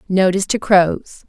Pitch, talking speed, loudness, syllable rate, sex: 190 Hz, 140 wpm, -16 LUFS, 4.6 syllables/s, female